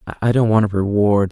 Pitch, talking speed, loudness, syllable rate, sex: 105 Hz, 230 wpm, -17 LUFS, 6.5 syllables/s, male